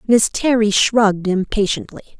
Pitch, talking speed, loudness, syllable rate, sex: 210 Hz, 110 wpm, -16 LUFS, 4.8 syllables/s, female